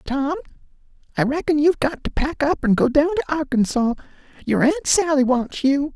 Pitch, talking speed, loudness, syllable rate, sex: 280 Hz, 170 wpm, -20 LUFS, 5.5 syllables/s, male